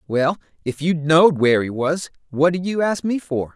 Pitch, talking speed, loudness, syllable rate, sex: 155 Hz, 220 wpm, -19 LUFS, 5.2 syllables/s, male